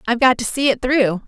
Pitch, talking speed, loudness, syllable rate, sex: 245 Hz, 285 wpm, -17 LUFS, 6.4 syllables/s, female